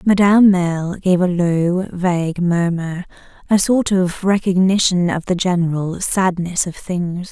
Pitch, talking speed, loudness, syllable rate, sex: 180 Hz, 140 wpm, -17 LUFS, 4.2 syllables/s, female